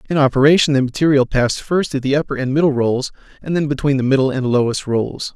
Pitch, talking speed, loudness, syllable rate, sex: 135 Hz, 225 wpm, -17 LUFS, 6.4 syllables/s, male